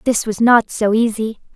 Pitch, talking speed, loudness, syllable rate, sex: 225 Hz, 195 wpm, -16 LUFS, 4.6 syllables/s, female